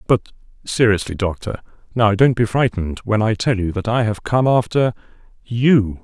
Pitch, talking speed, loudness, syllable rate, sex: 110 Hz, 150 wpm, -18 LUFS, 4.9 syllables/s, male